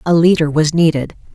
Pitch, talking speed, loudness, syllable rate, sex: 160 Hz, 180 wpm, -14 LUFS, 5.6 syllables/s, female